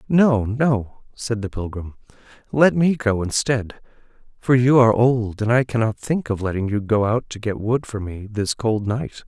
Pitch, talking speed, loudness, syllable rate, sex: 115 Hz, 195 wpm, -20 LUFS, 4.5 syllables/s, male